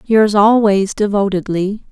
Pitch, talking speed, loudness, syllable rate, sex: 205 Hz, 95 wpm, -14 LUFS, 3.9 syllables/s, female